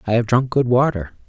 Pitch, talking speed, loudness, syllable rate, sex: 115 Hz, 235 wpm, -18 LUFS, 5.8 syllables/s, male